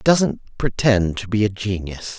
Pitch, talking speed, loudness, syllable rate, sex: 105 Hz, 190 wpm, -21 LUFS, 4.7 syllables/s, male